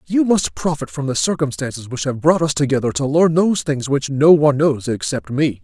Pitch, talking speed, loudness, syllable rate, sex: 140 Hz, 225 wpm, -17 LUFS, 5.4 syllables/s, male